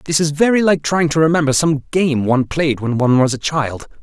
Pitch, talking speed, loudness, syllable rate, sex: 150 Hz, 240 wpm, -16 LUFS, 5.7 syllables/s, male